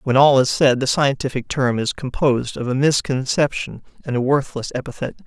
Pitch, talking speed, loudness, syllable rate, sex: 135 Hz, 180 wpm, -19 LUFS, 5.3 syllables/s, male